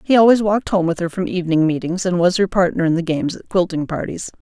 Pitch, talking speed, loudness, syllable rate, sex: 180 Hz, 255 wpm, -18 LUFS, 6.6 syllables/s, female